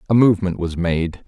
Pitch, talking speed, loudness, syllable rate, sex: 90 Hz, 190 wpm, -19 LUFS, 5.6 syllables/s, male